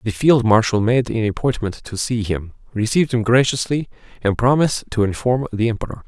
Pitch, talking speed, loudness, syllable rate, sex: 115 Hz, 180 wpm, -19 LUFS, 5.6 syllables/s, male